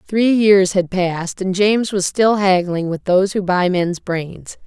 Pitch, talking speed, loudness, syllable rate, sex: 190 Hz, 195 wpm, -16 LUFS, 4.2 syllables/s, female